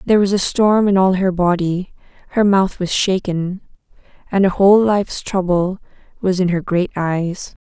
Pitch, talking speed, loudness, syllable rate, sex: 190 Hz, 175 wpm, -17 LUFS, 4.8 syllables/s, female